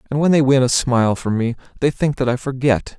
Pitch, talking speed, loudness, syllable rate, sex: 130 Hz, 260 wpm, -18 LUFS, 6.0 syllables/s, male